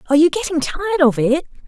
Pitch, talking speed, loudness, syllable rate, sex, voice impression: 315 Hz, 215 wpm, -17 LUFS, 8.3 syllables/s, female, feminine, adult-like, slightly relaxed, powerful, slightly muffled, slightly raspy, calm, unique, elegant, lively, slightly sharp, modest